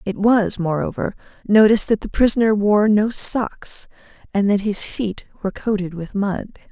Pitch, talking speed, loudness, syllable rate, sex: 205 Hz, 160 wpm, -19 LUFS, 4.7 syllables/s, female